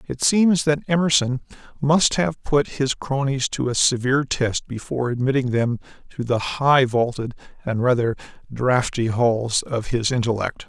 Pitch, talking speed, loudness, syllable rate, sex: 130 Hz, 150 wpm, -21 LUFS, 4.5 syllables/s, male